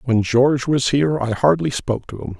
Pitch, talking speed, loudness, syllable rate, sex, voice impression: 130 Hz, 225 wpm, -18 LUFS, 5.8 syllables/s, male, very masculine, very adult-like, thick, slightly muffled, cool, slightly sincere, calm, slightly wild